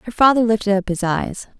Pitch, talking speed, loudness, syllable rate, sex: 215 Hz, 225 wpm, -18 LUFS, 5.8 syllables/s, female